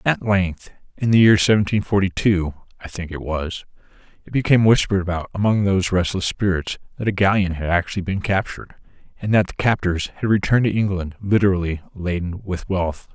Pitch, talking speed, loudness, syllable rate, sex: 95 Hz, 170 wpm, -20 LUFS, 5.8 syllables/s, male